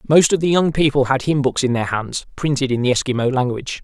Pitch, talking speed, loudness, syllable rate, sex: 135 Hz, 250 wpm, -18 LUFS, 6.2 syllables/s, male